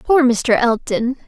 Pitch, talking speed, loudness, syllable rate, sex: 250 Hz, 140 wpm, -16 LUFS, 3.7 syllables/s, female